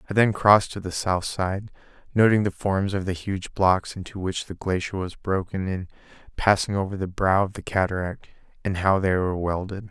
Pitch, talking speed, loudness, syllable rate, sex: 95 Hz, 200 wpm, -24 LUFS, 5.2 syllables/s, male